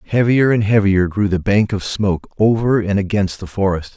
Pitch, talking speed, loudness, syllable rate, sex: 100 Hz, 195 wpm, -16 LUFS, 5.1 syllables/s, male